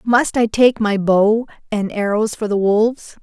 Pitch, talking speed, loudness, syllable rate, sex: 215 Hz, 185 wpm, -17 LUFS, 4.2 syllables/s, female